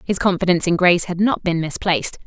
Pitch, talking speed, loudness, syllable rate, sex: 180 Hz, 210 wpm, -18 LUFS, 6.7 syllables/s, female